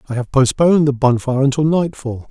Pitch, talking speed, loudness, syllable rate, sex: 135 Hz, 185 wpm, -15 LUFS, 6.1 syllables/s, male